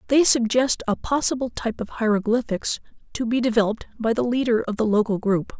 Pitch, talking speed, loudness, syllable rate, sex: 225 Hz, 180 wpm, -22 LUFS, 5.9 syllables/s, female